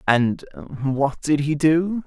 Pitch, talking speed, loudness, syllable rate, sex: 150 Hz, 145 wpm, -21 LUFS, 3.3 syllables/s, male